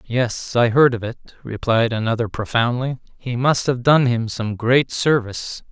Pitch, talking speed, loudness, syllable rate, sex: 120 Hz, 170 wpm, -19 LUFS, 4.5 syllables/s, male